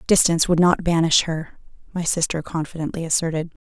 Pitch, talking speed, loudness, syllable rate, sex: 165 Hz, 150 wpm, -20 LUFS, 5.9 syllables/s, female